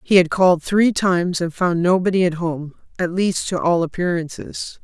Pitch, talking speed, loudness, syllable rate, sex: 175 Hz, 175 wpm, -19 LUFS, 4.9 syllables/s, female